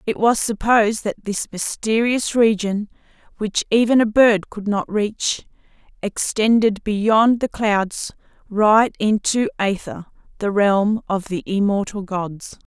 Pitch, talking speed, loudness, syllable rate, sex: 210 Hz, 125 wpm, -19 LUFS, 3.8 syllables/s, female